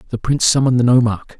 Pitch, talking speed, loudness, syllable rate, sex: 120 Hz, 215 wpm, -15 LUFS, 8.7 syllables/s, male